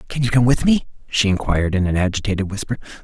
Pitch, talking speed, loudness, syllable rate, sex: 110 Hz, 220 wpm, -19 LUFS, 7.1 syllables/s, male